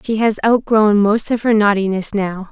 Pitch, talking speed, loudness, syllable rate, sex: 210 Hz, 190 wpm, -15 LUFS, 4.6 syllables/s, female